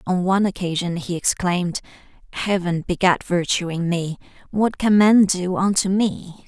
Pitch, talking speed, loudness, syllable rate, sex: 185 Hz, 150 wpm, -20 LUFS, 4.8 syllables/s, female